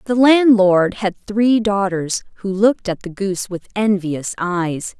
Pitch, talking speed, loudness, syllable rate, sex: 195 Hz, 155 wpm, -17 LUFS, 4.0 syllables/s, female